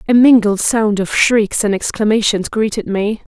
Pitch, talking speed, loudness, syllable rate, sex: 210 Hz, 160 wpm, -14 LUFS, 4.5 syllables/s, female